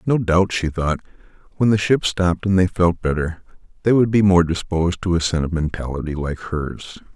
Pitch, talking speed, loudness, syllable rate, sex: 90 Hz, 185 wpm, -19 LUFS, 5.3 syllables/s, male